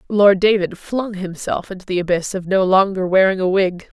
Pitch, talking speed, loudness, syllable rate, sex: 190 Hz, 195 wpm, -18 LUFS, 5.1 syllables/s, female